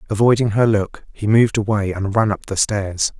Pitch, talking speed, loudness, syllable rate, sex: 105 Hz, 205 wpm, -18 LUFS, 5.2 syllables/s, male